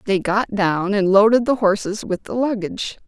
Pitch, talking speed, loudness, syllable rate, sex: 205 Hz, 195 wpm, -19 LUFS, 4.9 syllables/s, female